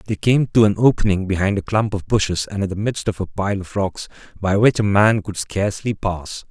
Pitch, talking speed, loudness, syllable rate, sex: 100 Hz, 240 wpm, -19 LUFS, 5.4 syllables/s, male